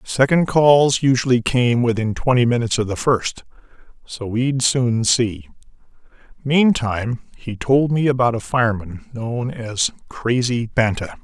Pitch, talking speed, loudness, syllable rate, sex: 120 Hz, 135 wpm, -18 LUFS, 4.3 syllables/s, male